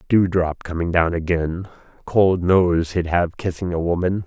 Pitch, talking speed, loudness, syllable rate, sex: 85 Hz, 155 wpm, -20 LUFS, 4.3 syllables/s, male